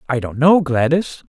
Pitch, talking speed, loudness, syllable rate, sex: 145 Hz, 185 wpm, -16 LUFS, 4.6 syllables/s, male